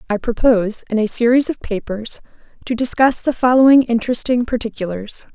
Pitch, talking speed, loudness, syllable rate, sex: 235 Hz, 145 wpm, -17 LUFS, 5.7 syllables/s, female